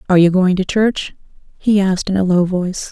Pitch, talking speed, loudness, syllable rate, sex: 190 Hz, 225 wpm, -16 LUFS, 6.1 syllables/s, female